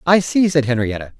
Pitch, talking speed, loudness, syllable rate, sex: 145 Hz, 200 wpm, -17 LUFS, 5.8 syllables/s, male